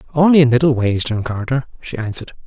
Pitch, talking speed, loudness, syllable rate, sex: 130 Hz, 195 wpm, -16 LUFS, 6.7 syllables/s, male